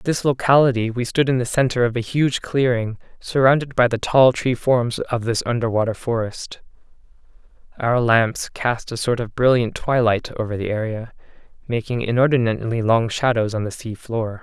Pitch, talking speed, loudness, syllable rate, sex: 120 Hz, 165 wpm, -20 LUFS, 5.0 syllables/s, male